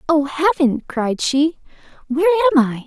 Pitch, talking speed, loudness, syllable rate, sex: 270 Hz, 145 wpm, -17 LUFS, 4.9 syllables/s, female